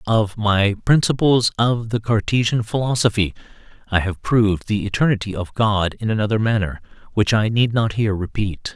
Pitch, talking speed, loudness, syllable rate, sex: 110 Hz, 160 wpm, -19 LUFS, 5.3 syllables/s, male